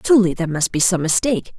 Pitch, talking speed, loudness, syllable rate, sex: 190 Hz, 230 wpm, -18 LUFS, 8.0 syllables/s, female